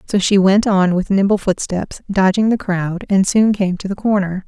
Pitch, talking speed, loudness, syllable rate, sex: 195 Hz, 215 wpm, -16 LUFS, 4.7 syllables/s, female